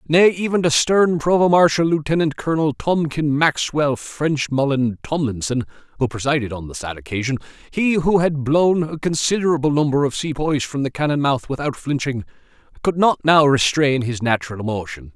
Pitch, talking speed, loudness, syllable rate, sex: 145 Hz, 145 wpm, -19 LUFS, 5.2 syllables/s, male